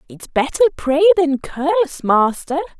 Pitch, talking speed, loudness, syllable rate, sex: 300 Hz, 130 wpm, -17 LUFS, 5.0 syllables/s, female